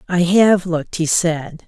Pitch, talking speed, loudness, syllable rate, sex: 175 Hz, 180 wpm, -16 LUFS, 4.1 syllables/s, female